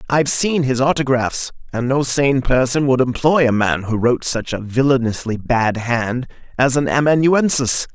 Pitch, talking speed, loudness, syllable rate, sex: 130 Hz, 165 wpm, -17 LUFS, 4.7 syllables/s, male